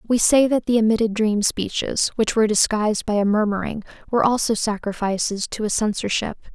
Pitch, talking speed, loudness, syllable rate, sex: 215 Hz, 175 wpm, -20 LUFS, 5.7 syllables/s, female